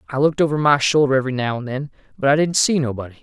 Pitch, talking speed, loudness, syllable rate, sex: 140 Hz, 260 wpm, -18 LUFS, 7.7 syllables/s, male